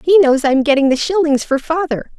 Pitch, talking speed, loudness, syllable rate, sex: 295 Hz, 220 wpm, -14 LUFS, 5.4 syllables/s, female